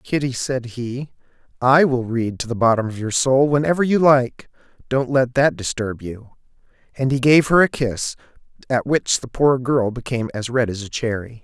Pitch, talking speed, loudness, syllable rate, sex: 125 Hz, 200 wpm, -19 LUFS, 4.8 syllables/s, male